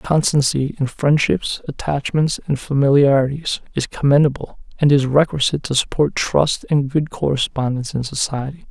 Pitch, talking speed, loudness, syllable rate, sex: 140 Hz, 130 wpm, -18 LUFS, 5.0 syllables/s, male